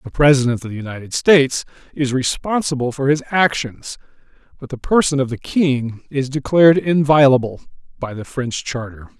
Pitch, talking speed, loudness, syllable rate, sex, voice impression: 135 Hz, 155 wpm, -17 LUFS, 5.2 syllables/s, male, very masculine, slightly old, thick, tensed, slightly powerful, bright, soft, clear, fluent, slightly raspy, cool, intellectual, refreshing, sincere, very calm, very mature, friendly, reassuring, unique, elegant, slightly wild, sweet, very lively, slightly kind, intense